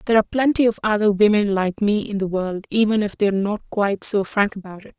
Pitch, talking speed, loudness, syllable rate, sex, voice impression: 205 Hz, 255 wpm, -20 LUFS, 6.5 syllables/s, female, feminine, adult-like, slightly powerful, slightly dark, clear, fluent, slightly raspy, intellectual, calm, elegant, slightly strict, slightly sharp